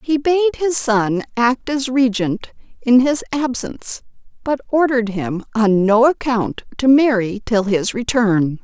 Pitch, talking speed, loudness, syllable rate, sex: 240 Hz, 145 wpm, -17 LUFS, 4.0 syllables/s, female